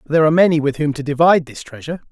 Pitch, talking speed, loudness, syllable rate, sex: 150 Hz, 285 wpm, -15 LUFS, 8.9 syllables/s, male